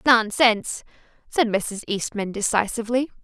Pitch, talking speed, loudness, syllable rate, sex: 220 Hz, 95 wpm, -22 LUFS, 4.7 syllables/s, female